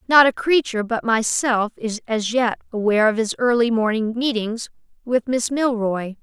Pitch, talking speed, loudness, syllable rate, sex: 230 Hz, 165 wpm, -20 LUFS, 4.8 syllables/s, female